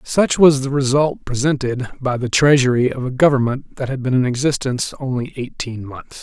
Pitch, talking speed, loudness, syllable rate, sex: 130 Hz, 185 wpm, -18 LUFS, 5.2 syllables/s, male